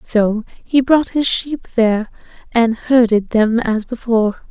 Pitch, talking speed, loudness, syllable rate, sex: 230 Hz, 145 wpm, -16 LUFS, 4.0 syllables/s, female